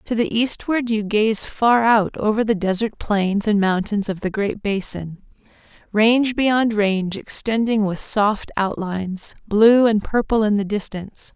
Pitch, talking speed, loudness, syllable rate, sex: 210 Hz, 160 wpm, -19 LUFS, 4.2 syllables/s, female